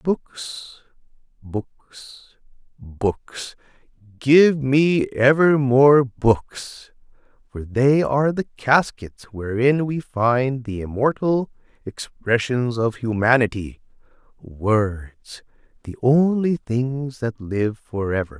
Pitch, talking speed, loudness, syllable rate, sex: 125 Hz, 85 wpm, -20 LUFS, 2.9 syllables/s, male